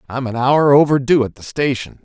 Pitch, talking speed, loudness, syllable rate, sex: 135 Hz, 205 wpm, -15 LUFS, 5.4 syllables/s, male